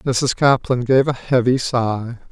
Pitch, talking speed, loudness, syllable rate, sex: 125 Hz, 155 wpm, -18 LUFS, 3.8 syllables/s, male